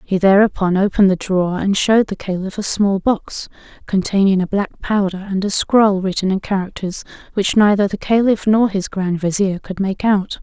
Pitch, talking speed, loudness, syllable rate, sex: 195 Hz, 190 wpm, -17 LUFS, 5.1 syllables/s, female